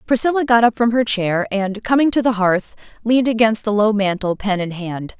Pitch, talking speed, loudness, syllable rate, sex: 215 Hz, 220 wpm, -17 LUFS, 5.3 syllables/s, female